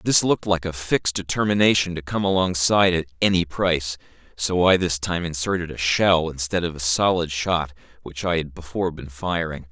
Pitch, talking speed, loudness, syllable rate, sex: 85 Hz, 185 wpm, -22 LUFS, 5.5 syllables/s, male